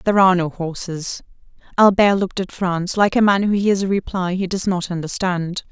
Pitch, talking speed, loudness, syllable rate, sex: 185 Hz, 200 wpm, -19 LUFS, 5.4 syllables/s, female